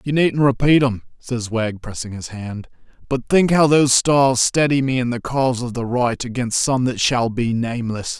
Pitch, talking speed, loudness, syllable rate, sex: 125 Hz, 205 wpm, -18 LUFS, 4.8 syllables/s, male